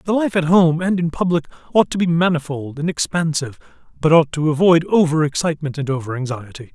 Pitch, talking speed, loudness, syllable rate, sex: 160 Hz, 195 wpm, -18 LUFS, 6.1 syllables/s, male